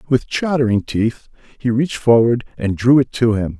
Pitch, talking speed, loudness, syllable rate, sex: 120 Hz, 185 wpm, -17 LUFS, 5.0 syllables/s, male